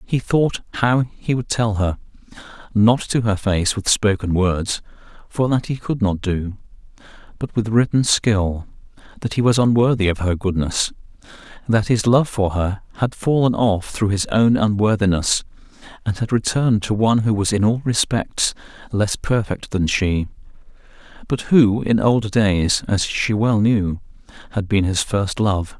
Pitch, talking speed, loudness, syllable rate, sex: 105 Hz, 160 wpm, -19 LUFS, 4.4 syllables/s, male